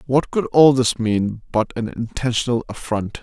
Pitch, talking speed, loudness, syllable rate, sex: 120 Hz, 165 wpm, -19 LUFS, 4.5 syllables/s, male